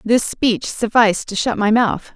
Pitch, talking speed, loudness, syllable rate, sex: 220 Hz, 195 wpm, -17 LUFS, 4.4 syllables/s, female